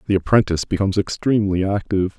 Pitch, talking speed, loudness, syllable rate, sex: 100 Hz, 135 wpm, -19 LUFS, 7.5 syllables/s, male